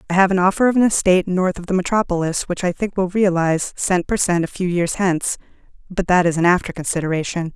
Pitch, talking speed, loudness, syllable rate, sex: 180 Hz, 230 wpm, -18 LUFS, 6.3 syllables/s, female